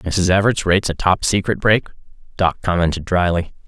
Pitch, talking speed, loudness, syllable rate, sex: 90 Hz, 145 wpm, -18 LUFS, 5.4 syllables/s, male